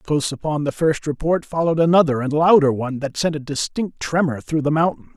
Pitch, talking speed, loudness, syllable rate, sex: 150 Hz, 210 wpm, -19 LUFS, 5.9 syllables/s, male